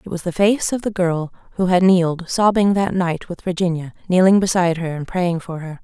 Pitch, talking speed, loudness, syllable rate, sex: 180 Hz, 225 wpm, -18 LUFS, 5.5 syllables/s, female